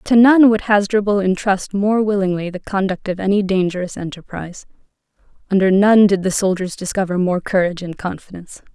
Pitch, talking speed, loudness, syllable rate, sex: 195 Hz, 160 wpm, -17 LUFS, 5.7 syllables/s, female